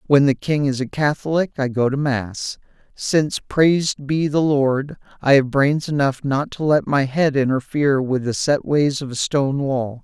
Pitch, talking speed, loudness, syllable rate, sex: 140 Hz, 195 wpm, -19 LUFS, 4.6 syllables/s, male